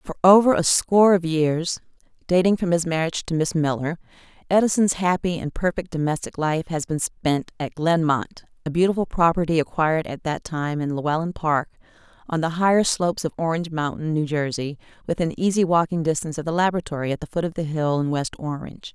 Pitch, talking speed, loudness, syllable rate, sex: 165 Hz, 185 wpm, -22 LUFS, 5.9 syllables/s, female